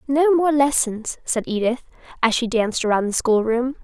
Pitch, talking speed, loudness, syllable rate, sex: 245 Hz, 170 wpm, -20 LUFS, 5.0 syllables/s, female